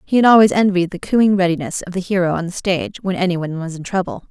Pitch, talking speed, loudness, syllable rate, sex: 180 Hz, 250 wpm, -17 LUFS, 6.5 syllables/s, female